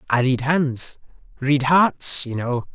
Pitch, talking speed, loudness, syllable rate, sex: 135 Hz, 130 wpm, -20 LUFS, 3.3 syllables/s, male